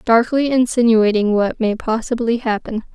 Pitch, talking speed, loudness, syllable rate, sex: 230 Hz, 120 wpm, -17 LUFS, 4.7 syllables/s, female